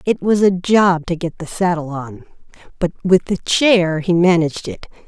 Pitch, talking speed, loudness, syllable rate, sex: 175 Hz, 190 wpm, -16 LUFS, 4.8 syllables/s, female